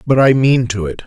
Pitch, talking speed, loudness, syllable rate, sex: 120 Hz, 280 wpm, -14 LUFS, 5.4 syllables/s, male